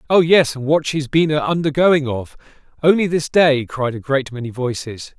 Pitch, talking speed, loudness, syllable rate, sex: 145 Hz, 195 wpm, -17 LUFS, 4.9 syllables/s, male